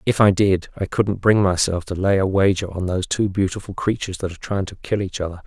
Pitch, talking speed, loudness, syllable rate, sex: 95 Hz, 250 wpm, -20 LUFS, 6.1 syllables/s, male